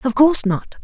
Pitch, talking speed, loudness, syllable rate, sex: 250 Hz, 215 wpm, -16 LUFS, 5.9 syllables/s, female